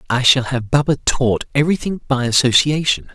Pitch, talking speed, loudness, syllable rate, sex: 135 Hz, 150 wpm, -16 LUFS, 5.3 syllables/s, male